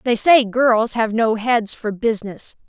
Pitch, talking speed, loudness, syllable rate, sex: 225 Hz, 180 wpm, -17 LUFS, 4.2 syllables/s, female